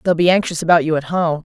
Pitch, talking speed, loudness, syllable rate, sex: 165 Hz, 275 wpm, -16 LUFS, 6.7 syllables/s, female